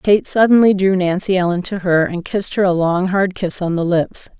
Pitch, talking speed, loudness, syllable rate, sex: 185 Hz, 230 wpm, -16 LUFS, 5.1 syllables/s, female